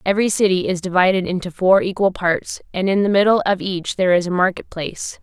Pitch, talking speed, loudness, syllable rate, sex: 185 Hz, 220 wpm, -18 LUFS, 6.0 syllables/s, female